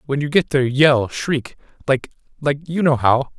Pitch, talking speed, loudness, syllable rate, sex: 140 Hz, 160 wpm, -18 LUFS, 5.2 syllables/s, male